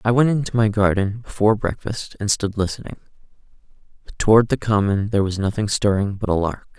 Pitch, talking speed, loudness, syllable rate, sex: 105 Hz, 185 wpm, -20 LUFS, 6.0 syllables/s, male